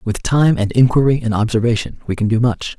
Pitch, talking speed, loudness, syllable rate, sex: 115 Hz, 215 wpm, -16 LUFS, 5.6 syllables/s, male